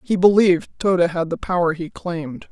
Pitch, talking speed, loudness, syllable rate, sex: 175 Hz, 190 wpm, -19 LUFS, 5.2 syllables/s, female